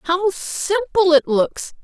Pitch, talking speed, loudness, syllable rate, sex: 355 Hz, 130 wpm, -18 LUFS, 2.9 syllables/s, female